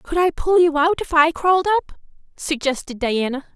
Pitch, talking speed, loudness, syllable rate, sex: 315 Hz, 185 wpm, -19 LUFS, 5.5 syllables/s, female